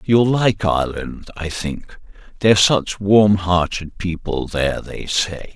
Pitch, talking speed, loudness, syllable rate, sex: 95 Hz, 140 wpm, -18 LUFS, 3.8 syllables/s, male